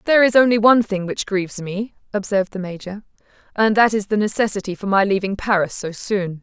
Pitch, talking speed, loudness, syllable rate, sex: 205 Hz, 205 wpm, -19 LUFS, 6.1 syllables/s, female